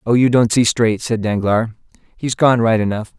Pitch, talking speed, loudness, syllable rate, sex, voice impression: 115 Hz, 205 wpm, -16 LUFS, 4.8 syllables/s, male, masculine, adult-like, slightly powerful, slightly hard, raspy, cool, calm, slightly mature, wild, slightly lively, slightly strict